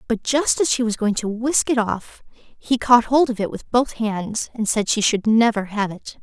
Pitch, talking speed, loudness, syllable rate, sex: 225 Hz, 240 wpm, -20 LUFS, 4.4 syllables/s, female